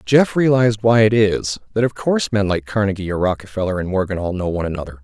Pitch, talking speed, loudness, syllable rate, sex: 100 Hz, 225 wpm, -18 LUFS, 6.5 syllables/s, male